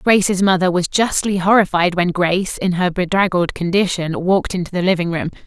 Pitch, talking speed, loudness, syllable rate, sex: 180 Hz, 175 wpm, -17 LUFS, 5.5 syllables/s, female